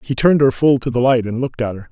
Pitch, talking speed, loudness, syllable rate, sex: 125 Hz, 345 wpm, -16 LUFS, 7.2 syllables/s, male